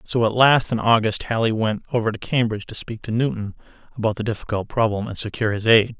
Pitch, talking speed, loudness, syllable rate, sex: 110 Hz, 220 wpm, -21 LUFS, 6.3 syllables/s, male